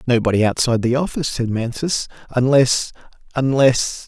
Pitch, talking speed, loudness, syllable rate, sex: 125 Hz, 120 wpm, -18 LUFS, 5.3 syllables/s, male